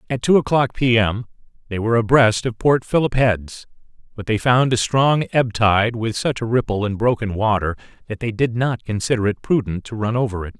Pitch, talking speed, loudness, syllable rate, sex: 115 Hz, 205 wpm, -19 LUFS, 5.3 syllables/s, male